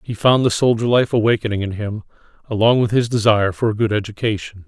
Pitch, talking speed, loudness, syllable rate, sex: 110 Hz, 205 wpm, -18 LUFS, 6.3 syllables/s, male